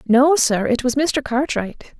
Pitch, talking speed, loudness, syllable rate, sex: 260 Hz, 150 wpm, -18 LUFS, 3.9 syllables/s, female